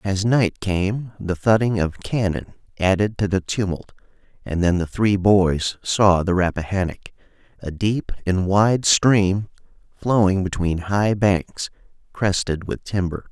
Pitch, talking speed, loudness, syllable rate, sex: 95 Hz, 140 wpm, -20 LUFS, 3.9 syllables/s, male